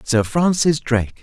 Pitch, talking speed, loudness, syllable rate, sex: 135 Hz, 145 wpm, -18 LUFS, 4.4 syllables/s, male